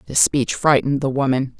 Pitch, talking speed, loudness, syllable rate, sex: 135 Hz, 190 wpm, -18 LUFS, 5.7 syllables/s, female